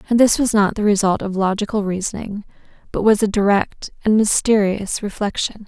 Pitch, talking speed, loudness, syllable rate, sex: 205 Hz, 170 wpm, -18 LUFS, 5.3 syllables/s, female